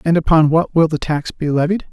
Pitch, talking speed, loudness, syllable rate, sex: 160 Hz, 250 wpm, -16 LUFS, 5.7 syllables/s, male